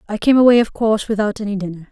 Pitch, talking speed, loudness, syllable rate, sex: 215 Hz, 250 wpm, -16 LUFS, 7.5 syllables/s, female